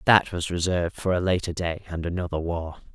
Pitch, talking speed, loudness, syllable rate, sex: 85 Hz, 205 wpm, -26 LUFS, 5.8 syllables/s, male